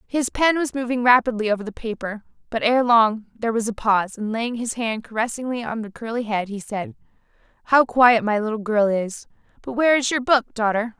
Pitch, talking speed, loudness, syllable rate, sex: 230 Hz, 205 wpm, -21 LUFS, 5.6 syllables/s, female